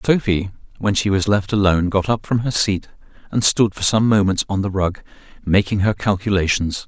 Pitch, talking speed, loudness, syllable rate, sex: 100 Hz, 190 wpm, -18 LUFS, 5.4 syllables/s, male